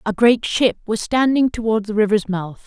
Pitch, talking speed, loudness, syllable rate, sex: 220 Hz, 205 wpm, -18 LUFS, 4.9 syllables/s, female